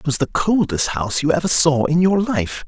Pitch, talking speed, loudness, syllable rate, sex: 155 Hz, 245 wpm, -17 LUFS, 5.3 syllables/s, male